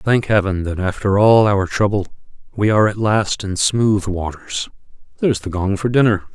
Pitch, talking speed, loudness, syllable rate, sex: 100 Hz, 180 wpm, -17 LUFS, 5.1 syllables/s, male